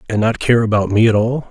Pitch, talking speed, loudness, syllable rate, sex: 110 Hz, 280 wpm, -15 LUFS, 6.1 syllables/s, male